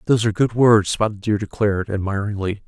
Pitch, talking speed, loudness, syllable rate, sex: 105 Hz, 180 wpm, -19 LUFS, 6.4 syllables/s, male